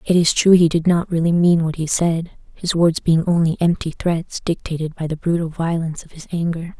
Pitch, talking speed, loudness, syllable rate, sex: 165 Hz, 220 wpm, -19 LUFS, 5.3 syllables/s, female